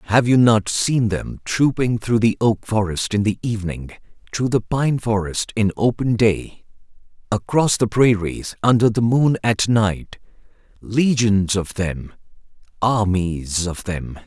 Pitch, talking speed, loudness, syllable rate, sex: 110 Hz, 145 wpm, -19 LUFS, 3.9 syllables/s, male